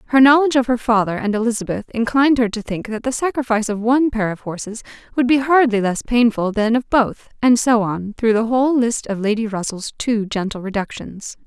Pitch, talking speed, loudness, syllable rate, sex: 230 Hz, 210 wpm, -18 LUFS, 5.7 syllables/s, female